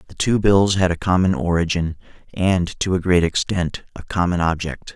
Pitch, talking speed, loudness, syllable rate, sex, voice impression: 90 Hz, 180 wpm, -19 LUFS, 4.9 syllables/s, male, masculine, adult-like, slightly thick, slightly fluent, slightly cool, slightly refreshing, slightly sincere